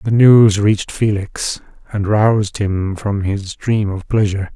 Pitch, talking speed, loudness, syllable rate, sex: 100 Hz, 160 wpm, -16 LUFS, 4.1 syllables/s, male